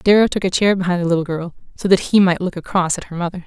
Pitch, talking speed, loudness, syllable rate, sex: 180 Hz, 295 wpm, -18 LUFS, 6.8 syllables/s, female